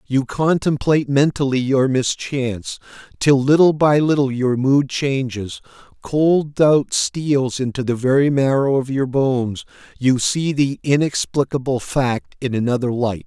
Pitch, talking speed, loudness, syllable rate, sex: 135 Hz, 135 wpm, -18 LUFS, 4.2 syllables/s, male